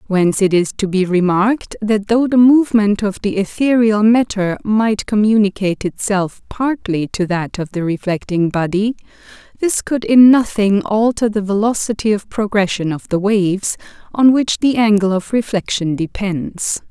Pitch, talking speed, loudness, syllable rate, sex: 205 Hz, 155 wpm, -16 LUFS, 4.7 syllables/s, female